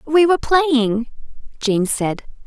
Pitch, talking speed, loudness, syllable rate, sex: 260 Hz, 120 wpm, -18 LUFS, 3.5 syllables/s, female